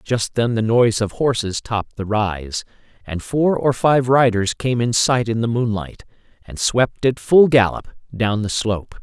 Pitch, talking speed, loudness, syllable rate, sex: 115 Hz, 185 wpm, -18 LUFS, 4.4 syllables/s, male